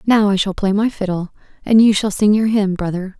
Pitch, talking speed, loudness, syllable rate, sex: 205 Hz, 245 wpm, -16 LUFS, 5.4 syllables/s, female